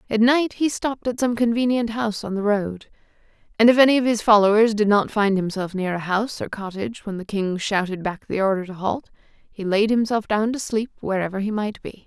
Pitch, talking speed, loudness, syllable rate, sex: 215 Hz, 225 wpm, -21 LUFS, 5.6 syllables/s, female